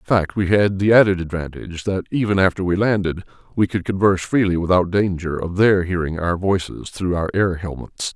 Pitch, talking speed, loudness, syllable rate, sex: 95 Hz, 200 wpm, -19 LUFS, 5.5 syllables/s, male